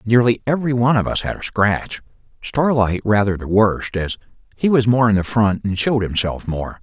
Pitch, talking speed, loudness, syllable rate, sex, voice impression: 110 Hz, 195 wpm, -18 LUFS, 5.2 syllables/s, male, masculine, adult-like, slightly thick, friendly, slightly unique